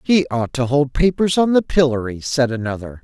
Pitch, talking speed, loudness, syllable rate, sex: 140 Hz, 200 wpm, -18 LUFS, 5.1 syllables/s, male